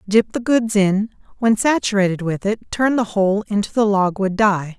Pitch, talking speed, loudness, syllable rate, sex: 205 Hz, 175 wpm, -18 LUFS, 4.9 syllables/s, female